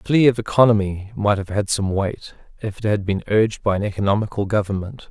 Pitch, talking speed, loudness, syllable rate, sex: 105 Hz, 210 wpm, -20 LUFS, 5.9 syllables/s, male